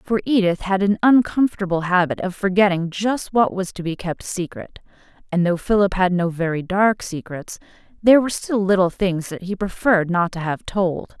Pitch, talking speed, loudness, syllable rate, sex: 190 Hz, 190 wpm, -20 LUFS, 5.2 syllables/s, female